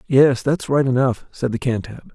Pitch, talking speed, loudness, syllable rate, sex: 130 Hz, 195 wpm, -19 LUFS, 4.6 syllables/s, male